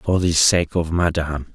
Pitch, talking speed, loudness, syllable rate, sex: 85 Hz, 195 wpm, -19 LUFS, 4.6 syllables/s, male